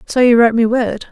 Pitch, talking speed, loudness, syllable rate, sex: 235 Hz, 270 wpm, -13 LUFS, 6.2 syllables/s, female